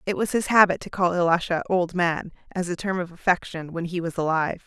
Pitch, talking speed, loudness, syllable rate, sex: 175 Hz, 230 wpm, -24 LUFS, 5.9 syllables/s, female